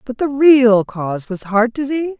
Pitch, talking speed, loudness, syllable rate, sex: 245 Hz, 190 wpm, -15 LUFS, 4.8 syllables/s, female